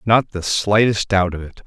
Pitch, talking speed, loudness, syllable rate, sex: 100 Hz, 215 wpm, -18 LUFS, 4.6 syllables/s, male